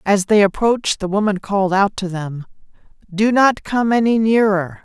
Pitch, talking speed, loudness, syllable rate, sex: 205 Hz, 175 wpm, -16 LUFS, 4.9 syllables/s, female